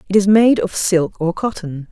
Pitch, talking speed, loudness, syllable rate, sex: 190 Hz, 220 wpm, -16 LUFS, 4.5 syllables/s, female